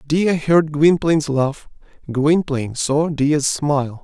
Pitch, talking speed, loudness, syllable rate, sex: 150 Hz, 120 wpm, -18 LUFS, 3.8 syllables/s, male